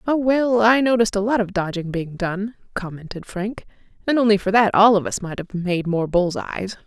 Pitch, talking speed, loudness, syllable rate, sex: 205 Hz, 220 wpm, -20 LUFS, 5.1 syllables/s, female